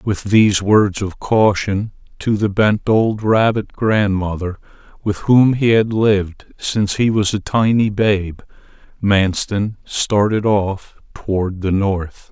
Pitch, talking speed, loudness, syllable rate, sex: 105 Hz, 135 wpm, -17 LUFS, 3.7 syllables/s, male